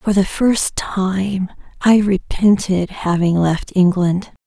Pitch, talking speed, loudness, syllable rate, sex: 190 Hz, 120 wpm, -17 LUFS, 3.2 syllables/s, female